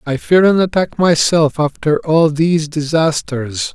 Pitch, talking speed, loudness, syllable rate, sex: 155 Hz, 145 wpm, -14 LUFS, 4.1 syllables/s, male